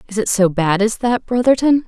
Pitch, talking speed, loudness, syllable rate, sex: 220 Hz, 225 wpm, -16 LUFS, 5.3 syllables/s, female